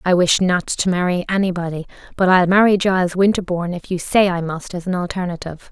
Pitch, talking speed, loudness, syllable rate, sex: 180 Hz, 200 wpm, -18 LUFS, 6.1 syllables/s, female